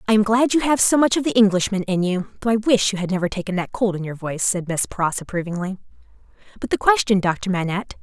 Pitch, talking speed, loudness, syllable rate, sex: 200 Hz, 245 wpm, -20 LUFS, 6.5 syllables/s, female